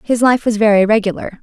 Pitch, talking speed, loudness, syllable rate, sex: 215 Hz, 210 wpm, -14 LUFS, 6.1 syllables/s, female